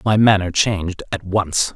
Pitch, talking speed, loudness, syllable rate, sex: 95 Hz, 170 wpm, -18 LUFS, 4.5 syllables/s, male